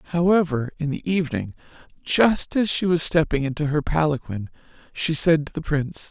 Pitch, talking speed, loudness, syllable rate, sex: 155 Hz, 165 wpm, -22 LUFS, 5.4 syllables/s, female